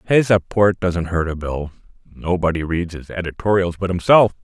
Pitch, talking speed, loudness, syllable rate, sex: 90 Hz, 160 wpm, -19 LUFS, 5.0 syllables/s, male